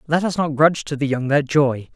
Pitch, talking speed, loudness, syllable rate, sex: 145 Hz, 275 wpm, -19 LUFS, 5.7 syllables/s, male